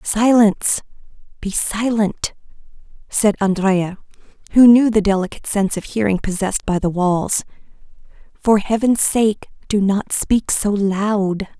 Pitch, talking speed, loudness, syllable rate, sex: 205 Hz, 120 wpm, -17 LUFS, 4.3 syllables/s, female